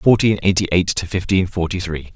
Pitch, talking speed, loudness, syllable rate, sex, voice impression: 90 Hz, 195 wpm, -18 LUFS, 5.5 syllables/s, male, masculine, adult-like, fluent, slightly cool, sincere, calm